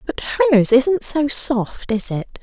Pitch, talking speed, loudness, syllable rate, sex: 255 Hz, 175 wpm, -17 LUFS, 3.5 syllables/s, female